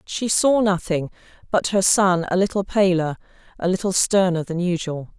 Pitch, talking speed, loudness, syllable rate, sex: 185 Hz, 160 wpm, -20 LUFS, 4.8 syllables/s, female